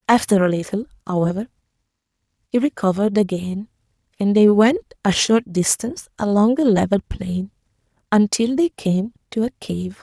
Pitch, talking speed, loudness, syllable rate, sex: 215 Hz, 140 wpm, -19 LUFS, 5.1 syllables/s, female